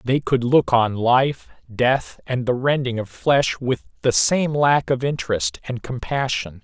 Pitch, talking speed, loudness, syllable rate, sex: 125 Hz, 170 wpm, -20 LUFS, 4.0 syllables/s, male